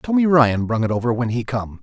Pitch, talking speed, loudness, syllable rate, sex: 125 Hz, 260 wpm, -19 LUFS, 5.6 syllables/s, male